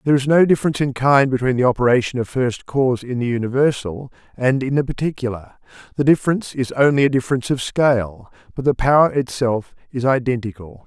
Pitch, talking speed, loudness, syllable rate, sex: 130 Hz, 180 wpm, -18 LUFS, 6.3 syllables/s, male